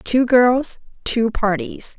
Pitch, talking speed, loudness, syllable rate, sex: 240 Hz, 90 wpm, -18 LUFS, 2.9 syllables/s, female